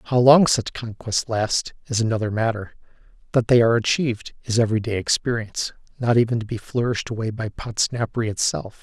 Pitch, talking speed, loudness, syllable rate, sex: 115 Hz, 170 wpm, -22 LUFS, 5.8 syllables/s, male